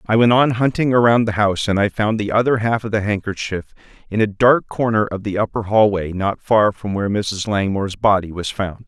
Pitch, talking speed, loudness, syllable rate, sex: 105 Hz, 225 wpm, -18 LUFS, 5.5 syllables/s, male